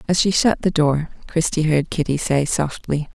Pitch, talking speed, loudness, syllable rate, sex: 155 Hz, 190 wpm, -20 LUFS, 4.6 syllables/s, female